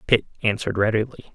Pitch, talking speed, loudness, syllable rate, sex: 110 Hz, 135 wpm, -23 LUFS, 7.4 syllables/s, male